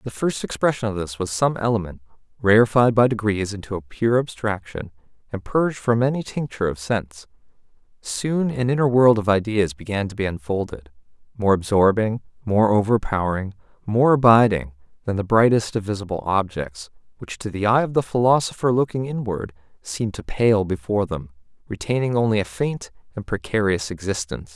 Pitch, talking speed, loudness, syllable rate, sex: 105 Hz, 160 wpm, -21 LUFS, 5.5 syllables/s, male